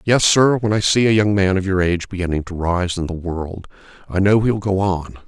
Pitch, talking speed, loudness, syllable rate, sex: 95 Hz, 250 wpm, -18 LUFS, 5.3 syllables/s, male